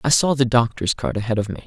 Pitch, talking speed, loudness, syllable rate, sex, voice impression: 120 Hz, 290 wpm, -20 LUFS, 6.4 syllables/s, male, masculine, slightly gender-neutral, young, slightly adult-like, very relaxed, very weak, dark, soft, slightly muffled, fluent, cool, slightly intellectual, very refreshing, sincere, very calm, mature, friendly, reassuring, slightly elegant, sweet, very kind, very modest